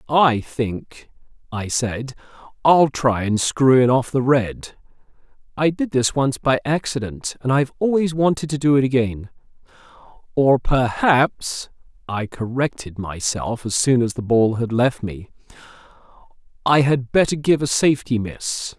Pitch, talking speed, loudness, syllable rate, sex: 130 Hz, 145 wpm, -19 LUFS, 3.2 syllables/s, male